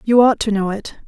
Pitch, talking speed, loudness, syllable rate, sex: 215 Hz, 280 wpm, -16 LUFS, 5.4 syllables/s, female